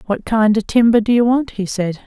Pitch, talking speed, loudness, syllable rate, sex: 220 Hz, 260 wpm, -16 LUFS, 5.4 syllables/s, female